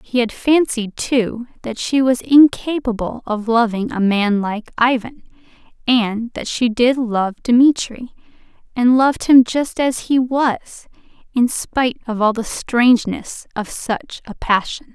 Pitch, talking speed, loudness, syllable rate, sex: 240 Hz, 150 wpm, -17 LUFS, 3.9 syllables/s, female